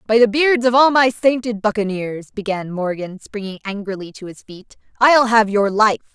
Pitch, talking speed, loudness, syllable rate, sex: 215 Hz, 185 wpm, -17 LUFS, 5.0 syllables/s, female